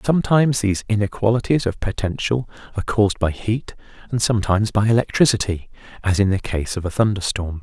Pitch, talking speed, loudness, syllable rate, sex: 105 Hz, 165 wpm, -20 LUFS, 6.3 syllables/s, male